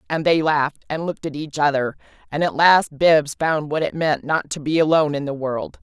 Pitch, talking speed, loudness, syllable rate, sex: 150 Hz, 235 wpm, -20 LUFS, 5.5 syllables/s, female